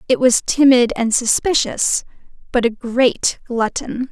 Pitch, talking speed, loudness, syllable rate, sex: 245 Hz, 130 wpm, -16 LUFS, 3.9 syllables/s, female